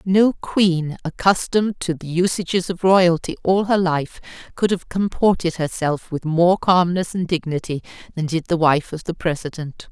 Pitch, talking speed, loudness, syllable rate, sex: 175 Hz, 165 wpm, -20 LUFS, 4.6 syllables/s, female